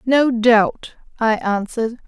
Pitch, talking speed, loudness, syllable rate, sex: 235 Hz, 115 wpm, -17 LUFS, 3.6 syllables/s, female